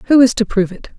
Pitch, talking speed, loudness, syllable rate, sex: 225 Hz, 305 wpm, -15 LUFS, 7.8 syllables/s, female